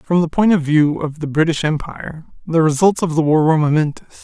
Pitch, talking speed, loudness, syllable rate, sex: 160 Hz, 225 wpm, -16 LUFS, 5.8 syllables/s, male